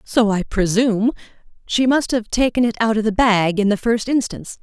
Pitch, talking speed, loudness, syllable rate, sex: 220 Hz, 205 wpm, -18 LUFS, 5.3 syllables/s, female